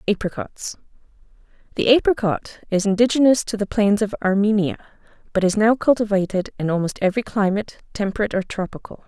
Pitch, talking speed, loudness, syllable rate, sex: 210 Hz, 130 wpm, -20 LUFS, 6.0 syllables/s, female